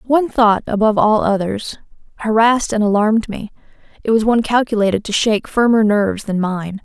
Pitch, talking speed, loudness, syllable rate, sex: 215 Hz, 165 wpm, -16 LUFS, 6.0 syllables/s, female